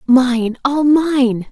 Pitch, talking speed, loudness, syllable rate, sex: 260 Hz, 120 wpm, -15 LUFS, 2.3 syllables/s, female